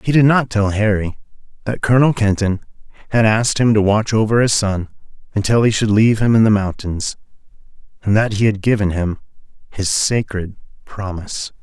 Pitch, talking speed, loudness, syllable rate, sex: 105 Hz, 170 wpm, -17 LUFS, 5.5 syllables/s, male